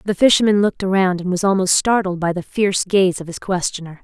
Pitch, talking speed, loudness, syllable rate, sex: 190 Hz, 225 wpm, -17 LUFS, 6.1 syllables/s, female